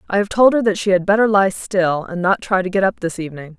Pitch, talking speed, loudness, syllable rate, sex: 190 Hz, 300 wpm, -17 LUFS, 6.2 syllables/s, female